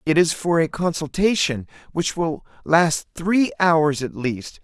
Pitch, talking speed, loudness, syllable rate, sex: 160 Hz, 155 wpm, -21 LUFS, 3.9 syllables/s, male